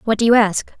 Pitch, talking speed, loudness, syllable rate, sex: 220 Hz, 300 wpm, -15 LUFS, 6.5 syllables/s, female